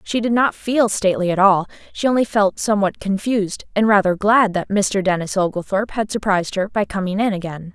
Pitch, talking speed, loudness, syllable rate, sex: 200 Hz, 195 wpm, -18 LUFS, 5.6 syllables/s, female